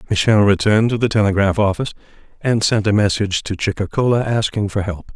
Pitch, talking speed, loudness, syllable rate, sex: 105 Hz, 175 wpm, -17 LUFS, 6.5 syllables/s, male